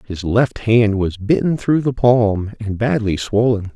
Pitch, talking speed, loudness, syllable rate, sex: 110 Hz, 175 wpm, -17 LUFS, 3.9 syllables/s, male